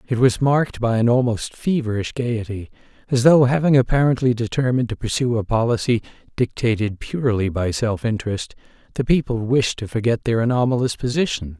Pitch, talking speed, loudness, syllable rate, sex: 120 Hz, 155 wpm, -20 LUFS, 5.7 syllables/s, male